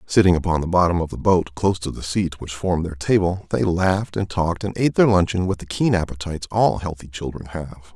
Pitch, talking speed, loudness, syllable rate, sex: 90 Hz, 235 wpm, -21 LUFS, 6.1 syllables/s, male